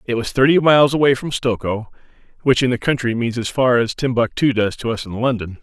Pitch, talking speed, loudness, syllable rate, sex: 120 Hz, 225 wpm, -18 LUFS, 5.9 syllables/s, male